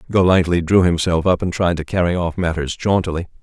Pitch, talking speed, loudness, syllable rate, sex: 85 Hz, 195 wpm, -18 LUFS, 5.8 syllables/s, male